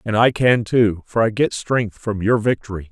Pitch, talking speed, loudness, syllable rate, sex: 110 Hz, 225 wpm, -18 LUFS, 4.7 syllables/s, male